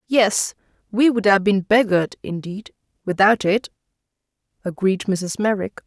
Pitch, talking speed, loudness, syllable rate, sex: 200 Hz, 125 wpm, -19 LUFS, 4.5 syllables/s, female